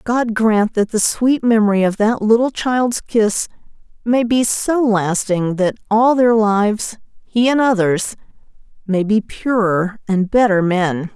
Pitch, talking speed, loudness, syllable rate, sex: 215 Hz, 150 wpm, -16 LUFS, 3.9 syllables/s, female